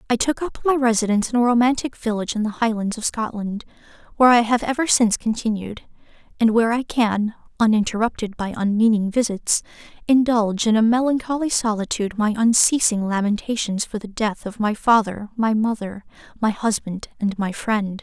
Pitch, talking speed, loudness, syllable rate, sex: 220 Hz, 165 wpm, -20 LUFS, 5.6 syllables/s, female